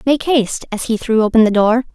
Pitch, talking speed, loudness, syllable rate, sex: 230 Hz, 245 wpm, -15 LUFS, 6.0 syllables/s, female